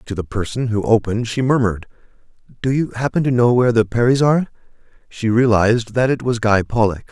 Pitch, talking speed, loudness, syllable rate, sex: 115 Hz, 195 wpm, -17 LUFS, 6.2 syllables/s, male